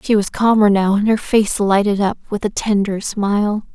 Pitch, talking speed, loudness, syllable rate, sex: 205 Hz, 210 wpm, -16 LUFS, 4.7 syllables/s, female